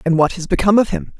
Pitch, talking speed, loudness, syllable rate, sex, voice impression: 185 Hz, 305 wpm, -16 LUFS, 7.5 syllables/s, female, feminine, adult-like, tensed, powerful, clear, fluent, slightly raspy, intellectual, calm, slightly reassuring, elegant, lively, slightly sharp